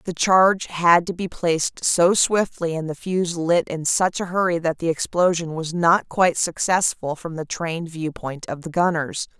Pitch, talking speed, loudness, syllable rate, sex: 170 Hz, 190 wpm, -21 LUFS, 4.6 syllables/s, female